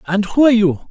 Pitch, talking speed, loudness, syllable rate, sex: 205 Hz, 265 wpm, -14 LUFS, 6.2 syllables/s, male